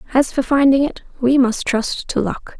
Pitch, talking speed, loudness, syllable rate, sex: 260 Hz, 210 wpm, -17 LUFS, 4.7 syllables/s, female